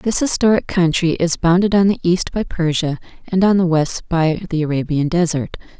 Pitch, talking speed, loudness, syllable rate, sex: 175 Hz, 185 wpm, -17 LUFS, 5.1 syllables/s, female